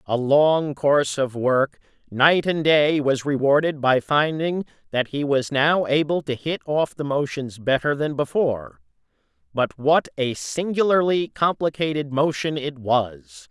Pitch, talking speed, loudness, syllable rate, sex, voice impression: 145 Hz, 145 wpm, -21 LUFS, 4.1 syllables/s, male, masculine, middle-aged, tensed, slightly powerful, bright, clear, fluent, friendly, reassuring, wild, lively, slightly strict, slightly sharp